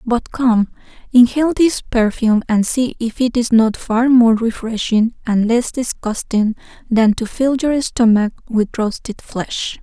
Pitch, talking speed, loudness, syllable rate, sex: 235 Hz, 155 wpm, -16 LUFS, 4.2 syllables/s, female